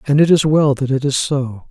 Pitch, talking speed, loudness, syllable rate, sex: 140 Hz, 280 wpm, -15 LUFS, 5.2 syllables/s, male